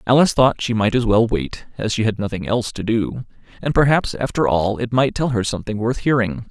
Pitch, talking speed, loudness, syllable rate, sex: 115 Hz, 230 wpm, -19 LUFS, 5.7 syllables/s, male